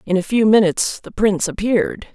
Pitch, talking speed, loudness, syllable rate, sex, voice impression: 200 Hz, 195 wpm, -17 LUFS, 6.1 syllables/s, female, feminine, adult-like, tensed, powerful, clear, slightly raspy, intellectual, calm, slightly friendly, elegant, lively, slightly intense, slightly sharp